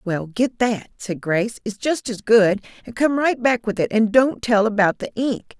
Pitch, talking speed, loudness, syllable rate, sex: 220 Hz, 225 wpm, -20 LUFS, 4.6 syllables/s, female